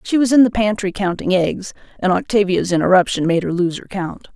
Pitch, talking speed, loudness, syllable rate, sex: 195 Hz, 205 wpm, -17 LUFS, 5.5 syllables/s, female